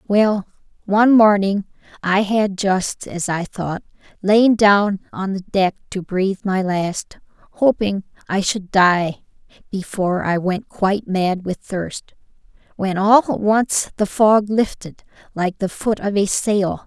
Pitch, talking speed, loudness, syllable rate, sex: 200 Hz, 150 wpm, -18 LUFS, 3.8 syllables/s, female